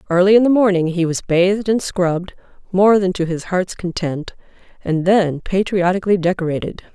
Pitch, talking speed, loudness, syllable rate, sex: 185 Hz, 165 wpm, -17 LUFS, 5.4 syllables/s, female